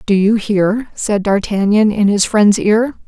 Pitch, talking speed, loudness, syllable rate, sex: 210 Hz, 175 wpm, -14 LUFS, 3.9 syllables/s, female